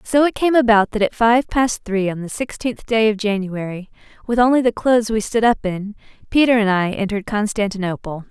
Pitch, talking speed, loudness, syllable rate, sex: 220 Hz, 200 wpm, -18 LUFS, 5.5 syllables/s, female